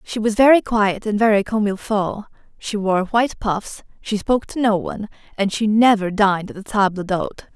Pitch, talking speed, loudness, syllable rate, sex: 210 Hz, 205 wpm, -19 LUFS, 5.4 syllables/s, female